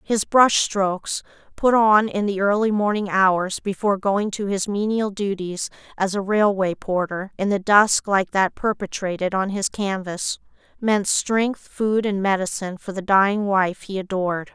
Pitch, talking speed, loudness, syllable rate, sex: 200 Hz, 160 wpm, -21 LUFS, 4.4 syllables/s, female